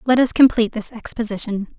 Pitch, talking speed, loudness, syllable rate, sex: 230 Hz, 170 wpm, -18 LUFS, 6.2 syllables/s, female